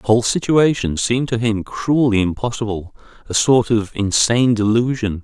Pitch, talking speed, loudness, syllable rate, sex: 115 Hz, 135 wpm, -17 LUFS, 5.2 syllables/s, male